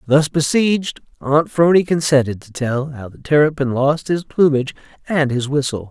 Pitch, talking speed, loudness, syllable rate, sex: 145 Hz, 165 wpm, -17 LUFS, 5.0 syllables/s, male